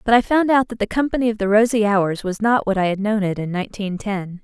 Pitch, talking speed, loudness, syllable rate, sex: 210 Hz, 285 wpm, -19 LUFS, 6.0 syllables/s, female